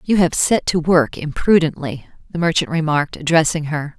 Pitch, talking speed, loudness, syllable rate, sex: 160 Hz, 165 wpm, -17 LUFS, 5.2 syllables/s, female